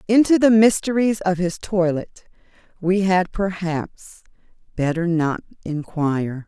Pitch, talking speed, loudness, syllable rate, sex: 180 Hz, 110 wpm, -20 LUFS, 4.1 syllables/s, female